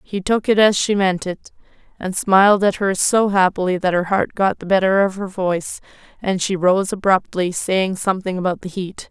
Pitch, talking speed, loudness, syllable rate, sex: 190 Hz, 205 wpm, -18 LUFS, 5.0 syllables/s, female